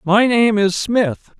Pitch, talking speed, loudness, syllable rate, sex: 210 Hz, 175 wpm, -16 LUFS, 3.2 syllables/s, male